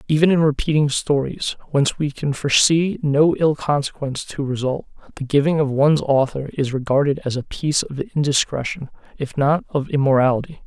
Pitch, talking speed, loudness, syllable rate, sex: 145 Hz, 165 wpm, -19 LUFS, 5.6 syllables/s, male